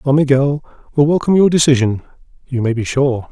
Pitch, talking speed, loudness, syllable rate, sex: 135 Hz, 180 wpm, -15 LUFS, 6.1 syllables/s, male